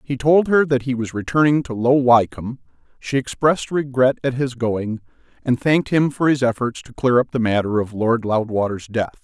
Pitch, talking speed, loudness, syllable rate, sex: 125 Hz, 200 wpm, -19 LUFS, 5.2 syllables/s, male